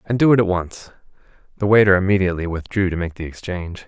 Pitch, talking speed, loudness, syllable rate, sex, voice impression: 95 Hz, 200 wpm, -19 LUFS, 6.8 syllables/s, male, very masculine, very middle-aged, very thick, tensed, slightly powerful, slightly bright, hard, slightly muffled, fluent, slightly raspy, cool, very intellectual, very refreshing, sincere, calm, mature, very friendly, very reassuring, unique, slightly elegant, wild, sweet, slightly lively, kind, slightly modest